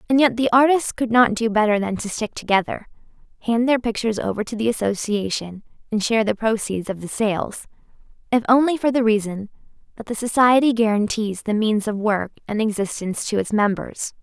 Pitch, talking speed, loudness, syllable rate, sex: 220 Hz, 185 wpm, -20 LUFS, 5.6 syllables/s, female